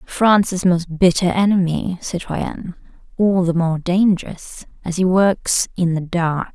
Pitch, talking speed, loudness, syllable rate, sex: 180 Hz, 140 wpm, -18 LUFS, 4.0 syllables/s, female